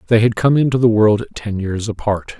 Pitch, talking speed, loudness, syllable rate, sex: 110 Hz, 225 wpm, -16 LUFS, 5.2 syllables/s, male